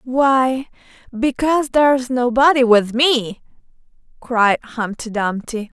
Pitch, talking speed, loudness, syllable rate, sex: 250 Hz, 95 wpm, -17 LUFS, 3.8 syllables/s, female